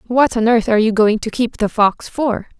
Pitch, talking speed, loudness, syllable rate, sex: 225 Hz, 255 wpm, -16 LUFS, 5.1 syllables/s, female